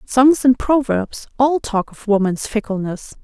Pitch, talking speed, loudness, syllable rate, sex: 235 Hz, 150 wpm, -18 LUFS, 4.0 syllables/s, female